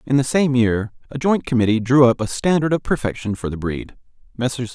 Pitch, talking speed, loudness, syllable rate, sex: 125 Hz, 215 wpm, -19 LUFS, 5.4 syllables/s, male